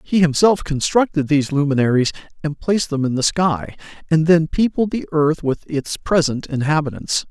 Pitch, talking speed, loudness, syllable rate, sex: 155 Hz, 165 wpm, -18 LUFS, 5.1 syllables/s, male